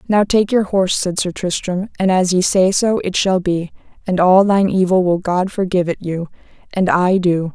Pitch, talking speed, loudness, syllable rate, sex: 185 Hz, 215 wpm, -16 LUFS, 5.1 syllables/s, female